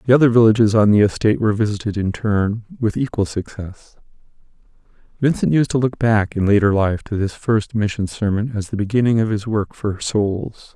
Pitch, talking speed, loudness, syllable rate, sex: 105 Hz, 190 wpm, -18 LUFS, 5.4 syllables/s, male